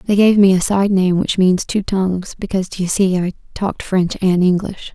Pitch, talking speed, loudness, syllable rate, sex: 190 Hz, 220 wpm, -16 LUFS, 5.1 syllables/s, female